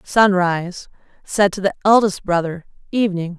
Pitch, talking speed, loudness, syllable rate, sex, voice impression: 190 Hz, 125 wpm, -18 LUFS, 5.1 syllables/s, female, feminine, adult-like, intellectual, slightly calm, elegant, slightly sweet